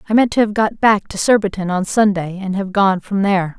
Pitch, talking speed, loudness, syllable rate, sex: 200 Hz, 250 wpm, -16 LUFS, 5.6 syllables/s, female